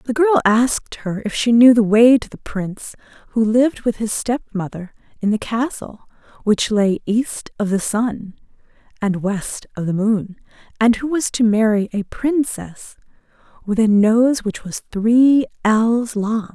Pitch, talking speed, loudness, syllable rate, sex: 225 Hz, 165 wpm, -18 LUFS, 4.1 syllables/s, female